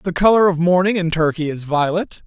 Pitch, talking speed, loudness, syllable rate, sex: 170 Hz, 210 wpm, -17 LUFS, 5.5 syllables/s, male